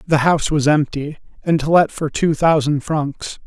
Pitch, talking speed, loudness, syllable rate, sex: 150 Hz, 190 wpm, -17 LUFS, 4.6 syllables/s, male